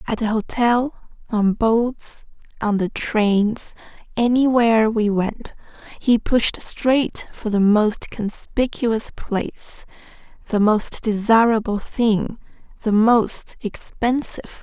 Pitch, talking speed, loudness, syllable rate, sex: 220 Hz, 105 wpm, -20 LUFS, 3.3 syllables/s, female